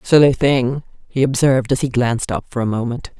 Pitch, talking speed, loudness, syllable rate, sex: 125 Hz, 205 wpm, -17 LUFS, 5.7 syllables/s, female